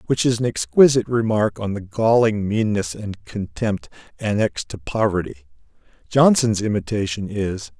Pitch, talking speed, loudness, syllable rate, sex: 110 Hz, 130 wpm, -20 LUFS, 4.9 syllables/s, male